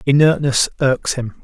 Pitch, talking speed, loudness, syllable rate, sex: 135 Hz, 125 wpm, -16 LUFS, 4.2 syllables/s, male